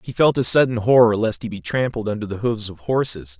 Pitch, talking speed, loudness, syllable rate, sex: 110 Hz, 250 wpm, -19 LUFS, 5.8 syllables/s, male